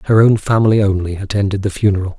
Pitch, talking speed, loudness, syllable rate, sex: 100 Hz, 190 wpm, -15 LUFS, 7.0 syllables/s, male